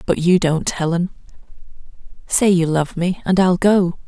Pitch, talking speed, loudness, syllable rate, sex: 175 Hz, 145 wpm, -17 LUFS, 4.5 syllables/s, female